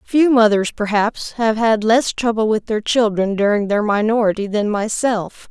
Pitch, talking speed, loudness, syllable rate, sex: 215 Hz, 165 wpm, -17 LUFS, 4.5 syllables/s, female